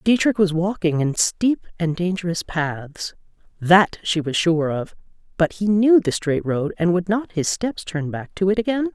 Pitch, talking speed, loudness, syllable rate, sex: 180 Hz, 195 wpm, -21 LUFS, 4.4 syllables/s, female